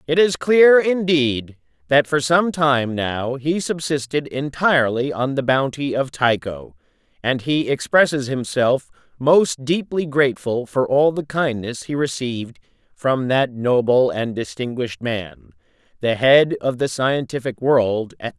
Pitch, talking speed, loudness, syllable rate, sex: 135 Hz, 145 wpm, -19 LUFS, 4.2 syllables/s, male